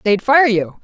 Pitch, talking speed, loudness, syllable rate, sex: 220 Hz, 215 wpm, -13 LUFS, 4.1 syllables/s, female